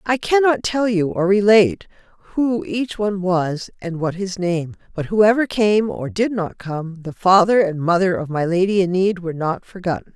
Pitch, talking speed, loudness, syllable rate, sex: 190 Hz, 190 wpm, -19 LUFS, 4.9 syllables/s, female